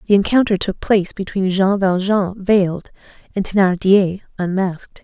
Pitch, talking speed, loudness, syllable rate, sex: 190 Hz, 130 wpm, -17 LUFS, 5.0 syllables/s, female